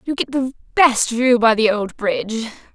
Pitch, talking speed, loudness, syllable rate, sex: 235 Hz, 195 wpm, -18 LUFS, 4.8 syllables/s, female